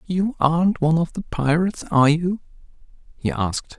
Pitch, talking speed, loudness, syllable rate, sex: 165 Hz, 160 wpm, -21 LUFS, 5.6 syllables/s, male